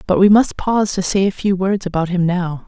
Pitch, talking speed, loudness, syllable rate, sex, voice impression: 185 Hz, 270 wpm, -16 LUFS, 5.5 syllables/s, female, feminine, adult-like, soft, slightly fluent, slightly intellectual, calm, elegant